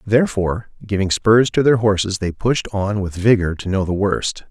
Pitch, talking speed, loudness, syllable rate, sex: 100 Hz, 200 wpm, -18 LUFS, 5.0 syllables/s, male